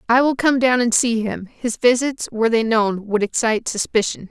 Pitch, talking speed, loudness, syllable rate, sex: 230 Hz, 210 wpm, -18 LUFS, 5.2 syllables/s, female